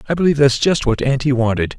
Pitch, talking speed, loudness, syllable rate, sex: 135 Hz, 235 wpm, -16 LUFS, 6.8 syllables/s, male